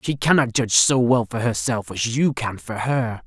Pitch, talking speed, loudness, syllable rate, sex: 120 Hz, 220 wpm, -20 LUFS, 4.7 syllables/s, male